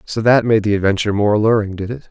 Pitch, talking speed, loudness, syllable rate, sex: 105 Hz, 255 wpm, -16 LUFS, 7.0 syllables/s, male